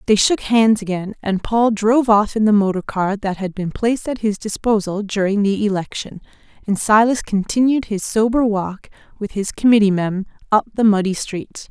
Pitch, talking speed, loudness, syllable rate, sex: 210 Hz, 185 wpm, -18 LUFS, 5.0 syllables/s, female